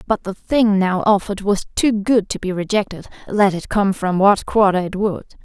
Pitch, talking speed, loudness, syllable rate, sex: 200 Hz, 210 wpm, -18 LUFS, 4.9 syllables/s, female